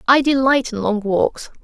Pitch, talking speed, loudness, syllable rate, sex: 250 Hz, 185 wpm, -17 LUFS, 4.4 syllables/s, female